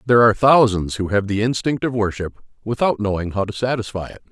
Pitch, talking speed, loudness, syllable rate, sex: 110 Hz, 210 wpm, -19 LUFS, 6.3 syllables/s, male